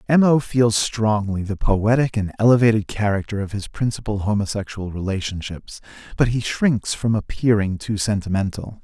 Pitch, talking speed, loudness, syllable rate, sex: 105 Hz, 145 wpm, -21 LUFS, 5.0 syllables/s, male